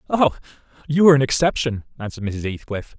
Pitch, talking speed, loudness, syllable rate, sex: 130 Hz, 160 wpm, -20 LUFS, 6.5 syllables/s, male